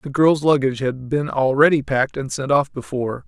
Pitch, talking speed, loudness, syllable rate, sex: 140 Hz, 200 wpm, -19 LUFS, 5.6 syllables/s, male